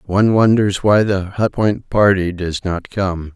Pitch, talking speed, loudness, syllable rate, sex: 100 Hz, 180 wpm, -16 LUFS, 4.1 syllables/s, male